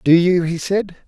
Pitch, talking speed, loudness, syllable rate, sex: 175 Hz, 225 wpm, -17 LUFS, 4.6 syllables/s, male